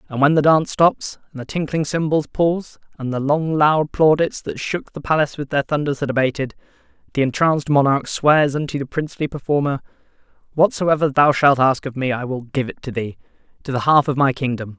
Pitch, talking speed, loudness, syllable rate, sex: 145 Hz, 205 wpm, -19 LUFS, 5.7 syllables/s, male